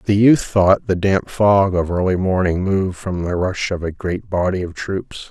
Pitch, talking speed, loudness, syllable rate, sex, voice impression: 95 Hz, 215 wpm, -18 LUFS, 4.5 syllables/s, male, masculine, very adult-like, thick, cool, sincere, calm, mature, slightly wild